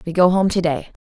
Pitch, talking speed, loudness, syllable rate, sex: 175 Hz, 235 wpm, -18 LUFS, 6.1 syllables/s, female